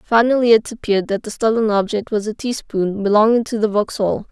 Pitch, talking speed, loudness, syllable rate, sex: 215 Hz, 195 wpm, -18 LUFS, 5.7 syllables/s, female